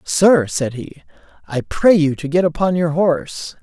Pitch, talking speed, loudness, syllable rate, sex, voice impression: 165 Hz, 180 wpm, -17 LUFS, 4.4 syllables/s, male, masculine, adult-like, powerful, slightly muffled, raspy, intellectual, mature, friendly, wild, lively